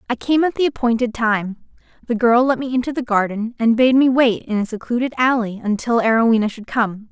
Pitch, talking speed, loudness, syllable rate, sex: 235 Hz, 210 wpm, -18 LUFS, 5.7 syllables/s, female